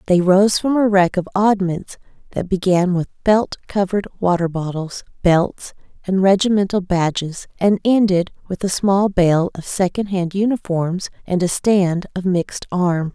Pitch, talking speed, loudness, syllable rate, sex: 185 Hz, 150 wpm, -18 LUFS, 4.4 syllables/s, female